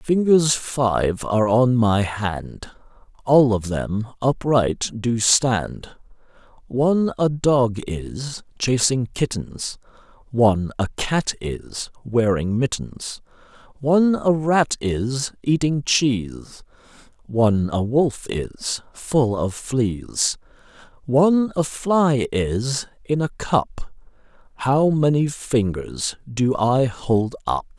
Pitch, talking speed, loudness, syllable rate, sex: 125 Hz, 110 wpm, -21 LUFS, 3.1 syllables/s, male